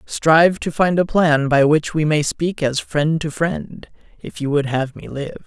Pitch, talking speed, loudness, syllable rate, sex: 155 Hz, 220 wpm, -18 LUFS, 4.2 syllables/s, male